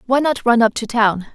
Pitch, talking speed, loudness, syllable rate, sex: 235 Hz, 265 wpm, -16 LUFS, 5.3 syllables/s, female